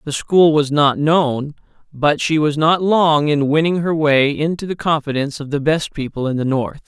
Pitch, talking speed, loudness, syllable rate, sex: 150 Hz, 210 wpm, -16 LUFS, 4.7 syllables/s, male